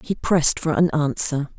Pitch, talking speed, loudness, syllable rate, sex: 150 Hz, 190 wpm, -20 LUFS, 4.9 syllables/s, female